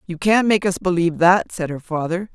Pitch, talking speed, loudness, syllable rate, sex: 180 Hz, 230 wpm, -19 LUFS, 5.5 syllables/s, female